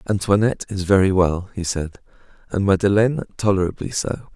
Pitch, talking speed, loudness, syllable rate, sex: 100 Hz, 140 wpm, -20 LUFS, 5.7 syllables/s, male